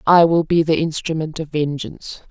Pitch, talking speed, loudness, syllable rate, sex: 160 Hz, 180 wpm, -19 LUFS, 5.3 syllables/s, female